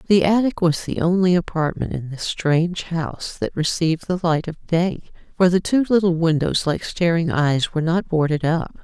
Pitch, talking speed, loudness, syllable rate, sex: 170 Hz, 190 wpm, -20 LUFS, 5.0 syllables/s, female